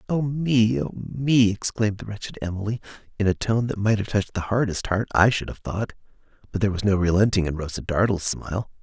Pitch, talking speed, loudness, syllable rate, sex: 105 Hz, 210 wpm, -23 LUFS, 5.9 syllables/s, male